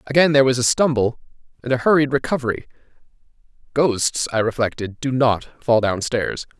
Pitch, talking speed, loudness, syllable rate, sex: 125 Hz, 145 wpm, -19 LUFS, 5.5 syllables/s, male